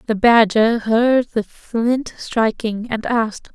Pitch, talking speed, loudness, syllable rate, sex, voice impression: 225 Hz, 135 wpm, -18 LUFS, 3.3 syllables/s, female, very feminine, slightly young, very thin, tensed, very weak, slightly dark, very soft, clear, fluent, raspy, very cute, very intellectual, refreshing, very sincere, very calm, very friendly, very reassuring, very unique, elegant, slightly wild, very sweet, lively, very kind, very modest, very light